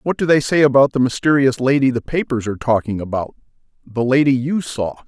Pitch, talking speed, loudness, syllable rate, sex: 130 Hz, 200 wpm, -17 LUFS, 6.4 syllables/s, male